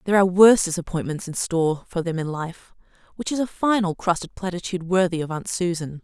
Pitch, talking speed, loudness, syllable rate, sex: 180 Hz, 210 wpm, -22 LUFS, 6.7 syllables/s, female